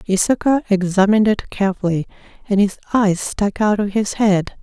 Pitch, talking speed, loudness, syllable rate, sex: 200 Hz, 155 wpm, -17 LUFS, 5.5 syllables/s, female